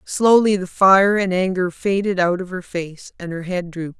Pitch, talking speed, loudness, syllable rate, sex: 185 Hz, 210 wpm, -18 LUFS, 4.7 syllables/s, female